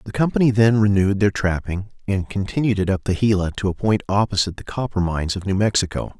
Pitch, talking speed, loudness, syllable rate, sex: 100 Hz, 215 wpm, -20 LUFS, 6.5 syllables/s, male